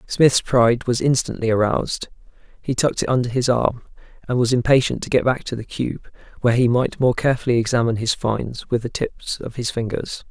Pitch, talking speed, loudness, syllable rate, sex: 120 Hz, 200 wpm, -20 LUFS, 5.8 syllables/s, male